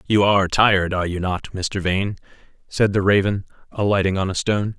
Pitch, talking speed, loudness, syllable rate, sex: 95 Hz, 190 wpm, -20 LUFS, 5.7 syllables/s, male